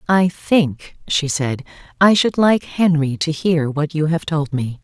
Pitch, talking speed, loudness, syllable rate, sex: 160 Hz, 185 wpm, -18 LUFS, 3.8 syllables/s, female